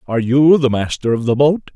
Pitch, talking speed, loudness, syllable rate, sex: 130 Hz, 240 wpm, -15 LUFS, 5.6 syllables/s, male